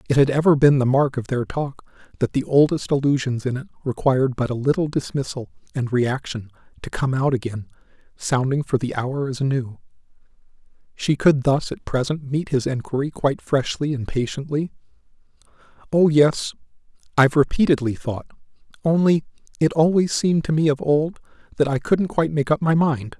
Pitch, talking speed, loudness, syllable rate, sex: 140 Hz, 170 wpm, -21 LUFS, 5.4 syllables/s, male